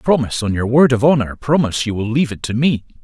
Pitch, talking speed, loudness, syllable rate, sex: 125 Hz, 220 wpm, -16 LUFS, 6.7 syllables/s, male